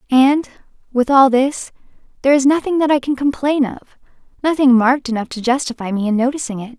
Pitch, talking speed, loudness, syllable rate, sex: 265 Hz, 175 wpm, -16 LUFS, 6.0 syllables/s, female